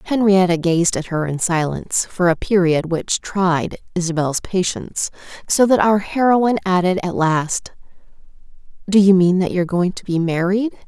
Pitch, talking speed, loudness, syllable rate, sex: 185 Hz, 160 wpm, -18 LUFS, 4.8 syllables/s, female